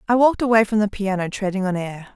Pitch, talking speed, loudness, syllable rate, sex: 205 Hz, 250 wpm, -20 LUFS, 6.7 syllables/s, female